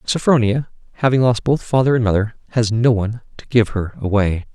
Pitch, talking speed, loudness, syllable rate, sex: 115 Hz, 185 wpm, -18 LUFS, 5.7 syllables/s, male